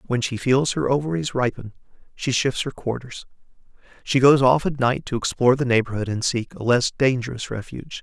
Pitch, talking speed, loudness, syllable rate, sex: 125 Hz, 185 wpm, -21 LUFS, 5.5 syllables/s, male